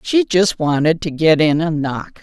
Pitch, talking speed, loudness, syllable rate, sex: 165 Hz, 215 wpm, -16 LUFS, 4.4 syllables/s, female